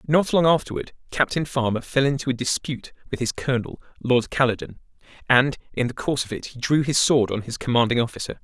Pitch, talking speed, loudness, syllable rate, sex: 130 Hz, 200 wpm, -22 LUFS, 6.2 syllables/s, male